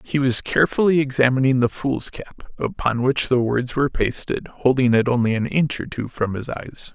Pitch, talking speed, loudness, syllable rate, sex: 130 Hz, 190 wpm, -20 LUFS, 5.0 syllables/s, male